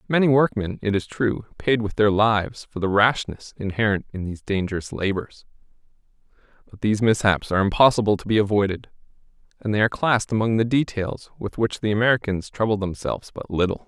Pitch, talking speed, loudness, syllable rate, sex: 105 Hz, 175 wpm, -22 LUFS, 6.1 syllables/s, male